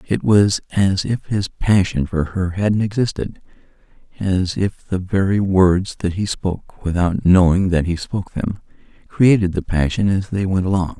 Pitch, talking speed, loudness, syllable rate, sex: 95 Hz, 170 wpm, -18 LUFS, 4.5 syllables/s, male